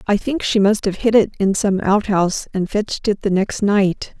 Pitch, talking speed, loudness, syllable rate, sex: 200 Hz, 230 wpm, -18 LUFS, 4.9 syllables/s, female